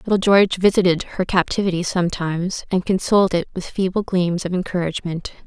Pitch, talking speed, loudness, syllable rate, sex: 185 Hz, 155 wpm, -20 LUFS, 6.0 syllables/s, female